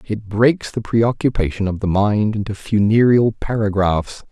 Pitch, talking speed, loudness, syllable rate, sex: 105 Hz, 140 wpm, -18 LUFS, 4.4 syllables/s, male